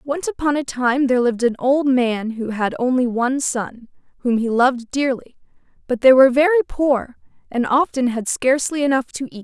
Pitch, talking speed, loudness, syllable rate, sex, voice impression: 255 Hz, 190 wpm, -18 LUFS, 5.3 syllables/s, female, slightly feminine, young, tensed, slightly clear, slightly cute, slightly refreshing, friendly, slightly lively